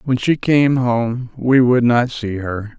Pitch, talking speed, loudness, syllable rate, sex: 120 Hz, 195 wpm, -16 LUFS, 3.5 syllables/s, male